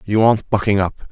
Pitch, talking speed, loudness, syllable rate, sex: 105 Hz, 215 wpm, -17 LUFS, 5.1 syllables/s, male